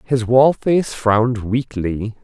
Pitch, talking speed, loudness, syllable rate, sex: 120 Hz, 105 wpm, -17 LUFS, 3.8 syllables/s, male